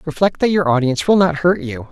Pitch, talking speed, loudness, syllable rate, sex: 155 Hz, 250 wpm, -16 LUFS, 6.2 syllables/s, male